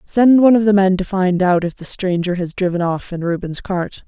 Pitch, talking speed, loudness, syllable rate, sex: 185 Hz, 250 wpm, -16 LUFS, 5.3 syllables/s, female